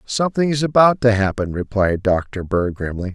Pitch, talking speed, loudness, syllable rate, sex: 110 Hz, 170 wpm, -18 LUFS, 5.0 syllables/s, male